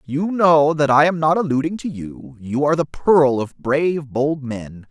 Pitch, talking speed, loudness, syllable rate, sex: 145 Hz, 210 wpm, -18 LUFS, 4.5 syllables/s, male